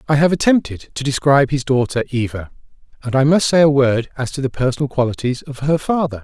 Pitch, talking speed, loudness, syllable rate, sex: 135 Hz, 210 wpm, -17 LUFS, 6.1 syllables/s, male